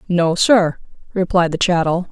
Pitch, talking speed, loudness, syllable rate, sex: 175 Hz, 140 wpm, -16 LUFS, 4.4 syllables/s, female